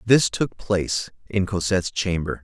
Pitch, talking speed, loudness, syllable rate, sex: 95 Hz, 150 wpm, -23 LUFS, 4.7 syllables/s, male